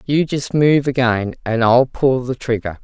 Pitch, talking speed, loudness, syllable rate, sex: 125 Hz, 190 wpm, -17 LUFS, 4.3 syllables/s, female